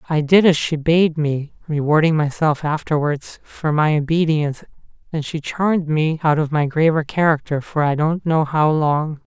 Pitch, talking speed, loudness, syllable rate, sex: 155 Hz, 160 wpm, -18 LUFS, 4.7 syllables/s, male